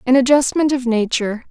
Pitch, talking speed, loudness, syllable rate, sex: 255 Hz, 160 wpm, -16 LUFS, 5.9 syllables/s, female